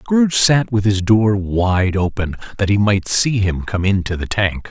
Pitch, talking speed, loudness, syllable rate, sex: 105 Hz, 205 wpm, -17 LUFS, 4.3 syllables/s, male